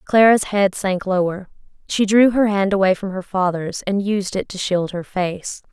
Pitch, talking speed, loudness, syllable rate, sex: 195 Hz, 200 wpm, -19 LUFS, 4.5 syllables/s, female